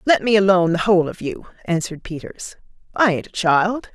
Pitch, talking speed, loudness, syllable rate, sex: 185 Hz, 200 wpm, -19 LUFS, 5.8 syllables/s, female